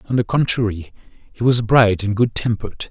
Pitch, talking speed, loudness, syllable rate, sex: 110 Hz, 185 wpm, -18 LUFS, 5.4 syllables/s, male